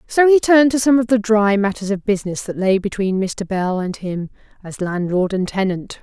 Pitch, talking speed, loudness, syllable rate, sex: 205 Hz, 220 wpm, -18 LUFS, 5.2 syllables/s, female